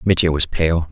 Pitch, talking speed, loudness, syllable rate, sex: 85 Hz, 195 wpm, -17 LUFS, 5.1 syllables/s, male